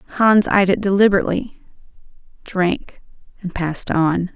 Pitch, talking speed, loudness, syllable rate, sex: 190 Hz, 110 wpm, -18 LUFS, 4.6 syllables/s, female